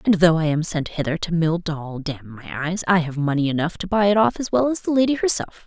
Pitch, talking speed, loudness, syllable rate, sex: 175 Hz, 275 wpm, -21 LUFS, 5.8 syllables/s, female